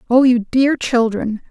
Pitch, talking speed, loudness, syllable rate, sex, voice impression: 240 Hz, 160 wpm, -16 LUFS, 4.0 syllables/s, female, feminine, adult-like, slightly soft, slightly fluent, slightly calm, friendly, slightly kind